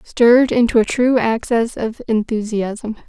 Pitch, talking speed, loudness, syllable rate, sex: 230 Hz, 135 wpm, -16 LUFS, 4.2 syllables/s, female